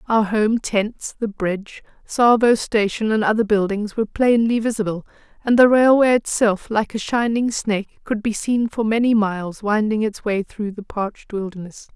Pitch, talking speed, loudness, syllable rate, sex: 215 Hz, 170 wpm, -19 LUFS, 4.8 syllables/s, female